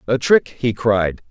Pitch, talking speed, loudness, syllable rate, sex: 115 Hz, 185 wpm, -17 LUFS, 3.7 syllables/s, male